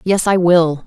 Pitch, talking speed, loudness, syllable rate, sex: 175 Hz, 210 wpm, -13 LUFS, 3.9 syllables/s, female